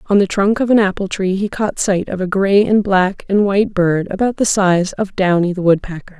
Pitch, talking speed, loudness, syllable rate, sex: 195 Hz, 240 wpm, -15 LUFS, 5.2 syllables/s, female